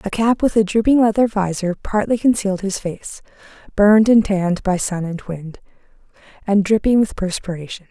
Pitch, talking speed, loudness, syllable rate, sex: 200 Hz, 165 wpm, -17 LUFS, 5.4 syllables/s, female